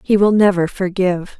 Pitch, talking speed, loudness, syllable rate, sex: 190 Hz, 170 wpm, -16 LUFS, 5.4 syllables/s, female